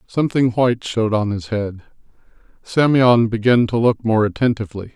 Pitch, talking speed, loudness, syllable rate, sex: 115 Hz, 145 wpm, -17 LUFS, 5.6 syllables/s, male